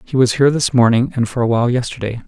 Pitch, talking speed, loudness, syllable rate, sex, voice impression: 125 Hz, 265 wpm, -16 LUFS, 7.1 syllables/s, male, masculine, adult-like, relaxed, weak, soft, raspy, calm, slightly friendly, wild, kind, modest